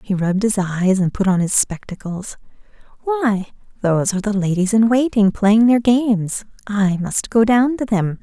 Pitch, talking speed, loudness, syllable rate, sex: 210 Hz, 180 wpm, -17 LUFS, 4.8 syllables/s, female